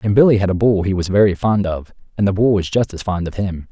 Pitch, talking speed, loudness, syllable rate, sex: 100 Hz, 305 wpm, -17 LUFS, 6.2 syllables/s, male